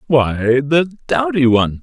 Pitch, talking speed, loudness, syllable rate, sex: 135 Hz, 130 wpm, -15 LUFS, 3.8 syllables/s, male